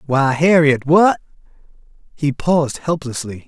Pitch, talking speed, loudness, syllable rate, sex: 145 Hz, 105 wpm, -16 LUFS, 4.4 syllables/s, male